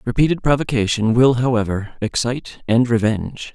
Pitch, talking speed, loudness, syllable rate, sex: 120 Hz, 120 wpm, -18 LUFS, 5.4 syllables/s, male